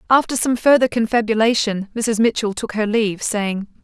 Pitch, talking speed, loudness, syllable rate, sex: 220 Hz, 155 wpm, -18 LUFS, 5.3 syllables/s, female